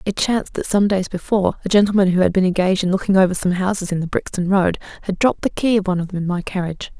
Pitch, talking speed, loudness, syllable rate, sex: 190 Hz, 275 wpm, -19 LUFS, 7.3 syllables/s, female